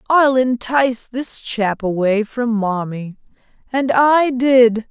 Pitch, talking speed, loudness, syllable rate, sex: 240 Hz, 120 wpm, -17 LUFS, 3.3 syllables/s, female